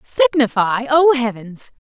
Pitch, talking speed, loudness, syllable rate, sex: 255 Hz, 95 wpm, -16 LUFS, 3.8 syllables/s, female